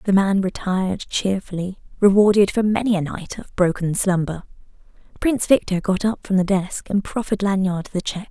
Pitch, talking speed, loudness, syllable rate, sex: 195 Hz, 175 wpm, -20 LUFS, 5.4 syllables/s, female